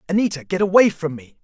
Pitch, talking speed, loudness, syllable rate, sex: 180 Hz, 210 wpm, -19 LUFS, 6.4 syllables/s, male